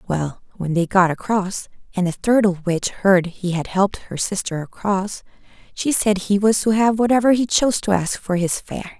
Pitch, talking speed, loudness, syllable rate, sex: 195 Hz, 205 wpm, -19 LUFS, 4.9 syllables/s, female